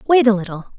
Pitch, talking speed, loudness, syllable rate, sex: 225 Hz, 230 wpm, -16 LUFS, 8.2 syllables/s, female